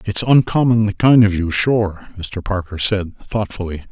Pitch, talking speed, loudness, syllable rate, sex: 100 Hz, 155 wpm, -17 LUFS, 4.4 syllables/s, male